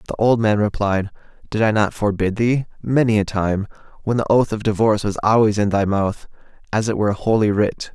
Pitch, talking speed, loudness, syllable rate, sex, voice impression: 105 Hz, 205 wpm, -19 LUFS, 5.6 syllables/s, male, masculine, adult-like, slightly dark, soft, clear, fluent, cool, refreshing, sincere, calm, friendly, reassuring, slightly wild, slightly kind, slightly modest